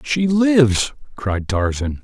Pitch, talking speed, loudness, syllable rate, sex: 120 Hz, 120 wpm, -18 LUFS, 3.5 syllables/s, male